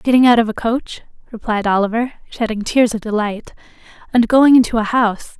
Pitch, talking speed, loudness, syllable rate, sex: 230 Hz, 180 wpm, -16 LUFS, 5.8 syllables/s, female